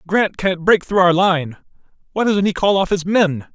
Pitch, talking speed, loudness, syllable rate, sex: 185 Hz, 220 wpm, -16 LUFS, 4.6 syllables/s, male